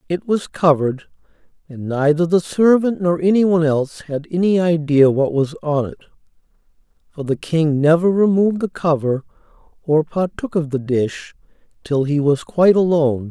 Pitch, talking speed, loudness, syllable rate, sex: 160 Hz, 155 wpm, -17 LUFS, 5.0 syllables/s, male